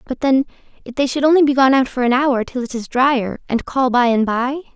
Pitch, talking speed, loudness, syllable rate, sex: 255 Hz, 265 wpm, -17 LUFS, 5.6 syllables/s, female